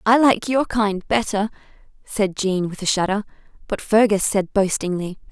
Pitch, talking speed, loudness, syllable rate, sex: 205 Hz, 160 wpm, -20 LUFS, 4.6 syllables/s, female